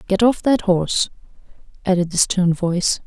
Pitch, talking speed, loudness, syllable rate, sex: 190 Hz, 155 wpm, -18 LUFS, 5.1 syllables/s, female